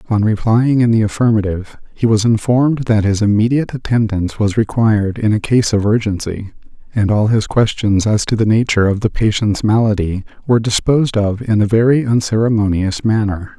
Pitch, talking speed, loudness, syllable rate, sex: 110 Hz, 170 wpm, -15 LUFS, 5.6 syllables/s, male